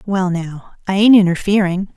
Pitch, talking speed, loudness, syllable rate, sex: 190 Hz, 155 wpm, -15 LUFS, 4.9 syllables/s, female